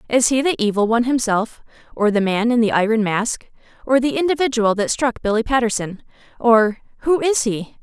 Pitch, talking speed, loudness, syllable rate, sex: 235 Hz, 175 wpm, -18 LUFS, 5.4 syllables/s, female